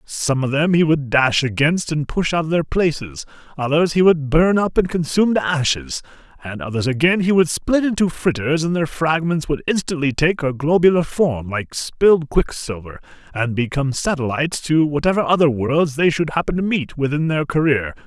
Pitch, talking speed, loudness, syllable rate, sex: 150 Hz, 195 wpm, -18 LUFS, 5.1 syllables/s, male